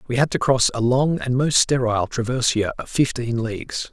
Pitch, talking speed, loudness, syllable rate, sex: 125 Hz, 200 wpm, -20 LUFS, 5.2 syllables/s, male